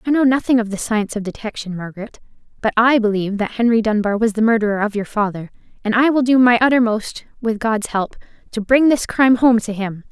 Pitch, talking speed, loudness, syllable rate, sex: 225 Hz, 220 wpm, -17 LUFS, 6.1 syllables/s, female